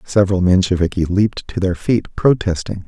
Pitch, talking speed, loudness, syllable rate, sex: 95 Hz, 145 wpm, -17 LUFS, 5.4 syllables/s, male